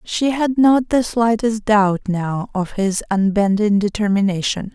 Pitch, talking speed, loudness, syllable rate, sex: 210 Hz, 140 wpm, -18 LUFS, 4.0 syllables/s, female